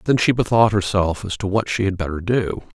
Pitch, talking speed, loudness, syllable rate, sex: 100 Hz, 235 wpm, -20 LUFS, 5.6 syllables/s, male